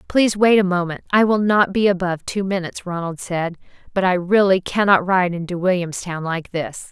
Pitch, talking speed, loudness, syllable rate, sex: 185 Hz, 190 wpm, -19 LUFS, 5.4 syllables/s, female